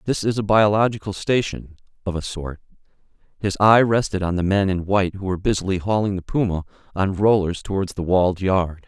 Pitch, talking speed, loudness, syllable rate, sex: 95 Hz, 180 wpm, -21 LUFS, 5.8 syllables/s, male